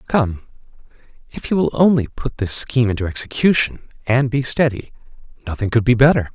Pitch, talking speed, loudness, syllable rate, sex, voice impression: 125 Hz, 160 wpm, -17 LUFS, 5.8 syllables/s, male, masculine, adult-like, tensed, powerful, bright, clear, slightly fluent, cool, intellectual, calm, slightly mature, friendly, reassuring, wild, lively, slightly light